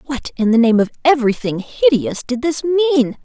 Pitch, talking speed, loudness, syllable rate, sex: 255 Hz, 185 wpm, -16 LUFS, 4.9 syllables/s, female